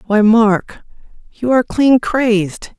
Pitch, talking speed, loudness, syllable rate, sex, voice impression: 225 Hz, 130 wpm, -14 LUFS, 3.8 syllables/s, female, feminine, adult-like, slightly dark, clear, fluent, friendly, unique, lively, kind